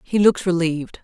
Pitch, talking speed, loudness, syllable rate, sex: 175 Hz, 175 wpm, -19 LUFS, 6.6 syllables/s, female